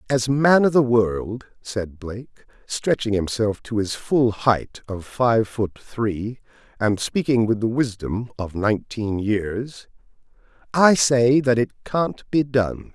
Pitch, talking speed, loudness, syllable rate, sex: 115 Hz, 150 wpm, -21 LUFS, 3.6 syllables/s, male